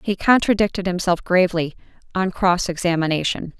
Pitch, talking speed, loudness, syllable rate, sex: 180 Hz, 115 wpm, -20 LUFS, 5.5 syllables/s, female